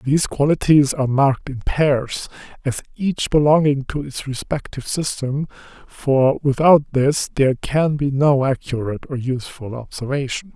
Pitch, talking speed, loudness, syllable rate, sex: 140 Hz, 135 wpm, -19 LUFS, 4.8 syllables/s, male